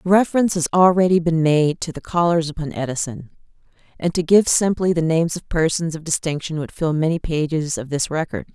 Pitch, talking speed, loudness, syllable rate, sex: 165 Hz, 190 wpm, -19 LUFS, 5.7 syllables/s, female